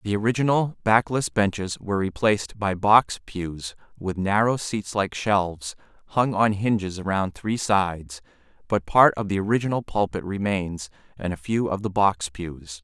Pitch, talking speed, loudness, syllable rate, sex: 100 Hz, 160 wpm, -23 LUFS, 4.6 syllables/s, male